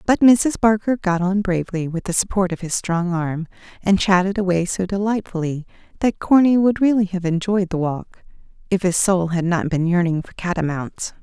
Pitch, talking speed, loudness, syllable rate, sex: 185 Hz, 185 wpm, -19 LUFS, 5.1 syllables/s, female